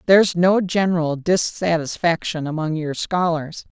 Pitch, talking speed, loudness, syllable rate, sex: 170 Hz, 110 wpm, -20 LUFS, 4.6 syllables/s, female